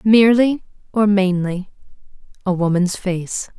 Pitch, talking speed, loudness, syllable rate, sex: 195 Hz, 100 wpm, -18 LUFS, 4.1 syllables/s, female